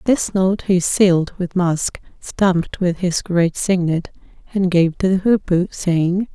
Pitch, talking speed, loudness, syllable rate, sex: 180 Hz, 160 wpm, -18 LUFS, 3.8 syllables/s, female